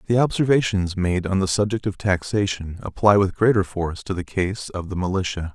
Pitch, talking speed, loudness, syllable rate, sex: 95 Hz, 195 wpm, -22 LUFS, 5.4 syllables/s, male